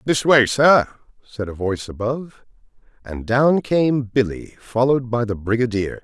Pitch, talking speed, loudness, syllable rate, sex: 120 Hz, 150 wpm, -19 LUFS, 4.6 syllables/s, male